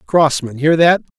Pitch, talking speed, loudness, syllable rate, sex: 155 Hz, 150 wpm, -14 LUFS, 4.1 syllables/s, male